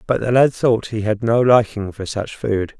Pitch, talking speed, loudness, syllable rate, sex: 110 Hz, 235 wpm, -18 LUFS, 4.5 syllables/s, male